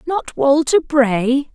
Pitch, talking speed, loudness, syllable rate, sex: 280 Hz, 115 wpm, -16 LUFS, 2.9 syllables/s, female